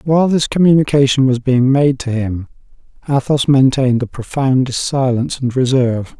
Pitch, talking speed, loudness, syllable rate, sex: 130 Hz, 145 wpm, -14 LUFS, 5.3 syllables/s, male